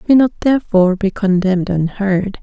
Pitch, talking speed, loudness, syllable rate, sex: 200 Hz, 175 wpm, -15 LUFS, 6.2 syllables/s, female